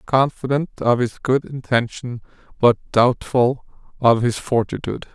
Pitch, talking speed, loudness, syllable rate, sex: 125 Hz, 115 wpm, -19 LUFS, 4.5 syllables/s, male